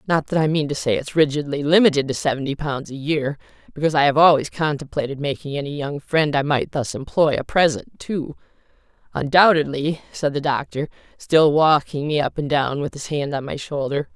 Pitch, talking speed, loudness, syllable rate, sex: 150 Hz, 195 wpm, -20 LUFS, 5.5 syllables/s, female